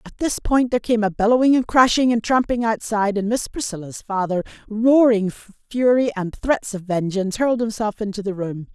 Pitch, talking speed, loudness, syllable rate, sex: 220 Hz, 185 wpm, -20 LUFS, 5.6 syllables/s, female